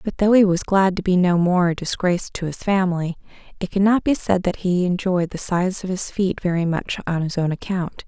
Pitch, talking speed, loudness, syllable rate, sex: 185 Hz, 240 wpm, -20 LUFS, 5.4 syllables/s, female